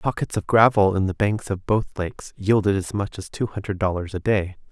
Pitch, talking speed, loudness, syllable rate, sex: 100 Hz, 230 wpm, -22 LUFS, 5.3 syllables/s, male